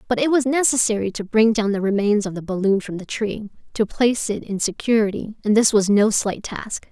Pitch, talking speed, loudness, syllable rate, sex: 215 Hz, 225 wpm, -20 LUFS, 5.5 syllables/s, female